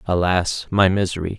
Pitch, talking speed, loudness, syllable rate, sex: 90 Hz, 130 wpm, -19 LUFS, 4.9 syllables/s, male